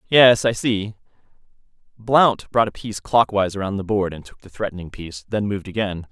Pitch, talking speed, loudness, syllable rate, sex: 105 Hz, 185 wpm, -20 LUFS, 5.8 syllables/s, male